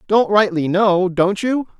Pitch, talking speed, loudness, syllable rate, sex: 195 Hz, 165 wpm, -16 LUFS, 3.9 syllables/s, male